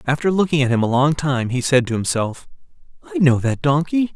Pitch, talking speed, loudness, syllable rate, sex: 140 Hz, 215 wpm, -18 LUFS, 5.5 syllables/s, male